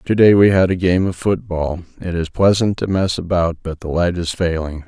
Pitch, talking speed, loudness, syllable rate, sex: 90 Hz, 220 wpm, -17 LUFS, 5.3 syllables/s, male